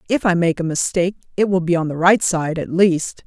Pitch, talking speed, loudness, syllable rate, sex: 175 Hz, 260 wpm, -18 LUFS, 5.6 syllables/s, female